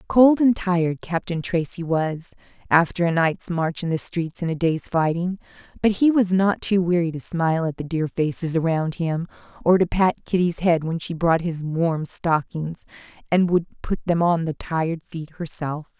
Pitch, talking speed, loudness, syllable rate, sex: 170 Hz, 190 wpm, -22 LUFS, 4.6 syllables/s, female